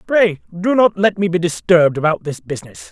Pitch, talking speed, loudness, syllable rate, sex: 170 Hz, 205 wpm, -16 LUFS, 5.6 syllables/s, male